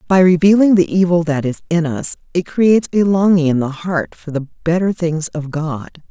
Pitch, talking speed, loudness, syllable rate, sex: 170 Hz, 205 wpm, -16 LUFS, 4.9 syllables/s, female